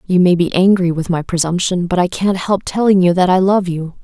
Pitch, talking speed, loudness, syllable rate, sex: 180 Hz, 255 wpm, -14 LUFS, 5.5 syllables/s, female